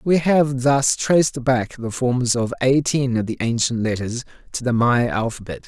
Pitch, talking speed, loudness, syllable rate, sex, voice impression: 125 Hz, 180 wpm, -20 LUFS, 4.4 syllables/s, male, masculine, adult-like, slightly tensed, raspy, calm, friendly, reassuring, slightly wild, kind, slightly modest